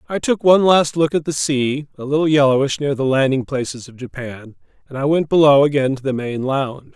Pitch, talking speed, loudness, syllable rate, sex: 140 Hz, 225 wpm, -17 LUFS, 5.7 syllables/s, male